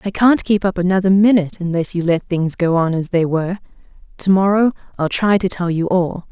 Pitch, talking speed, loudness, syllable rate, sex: 185 Hz, 210 wpm, -17 LUFS, 5.6 syllables/s, female